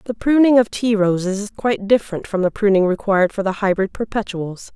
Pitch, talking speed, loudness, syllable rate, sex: 205 Hz, 200 wpm, -18 LUFS, 5.9 syllables/s, female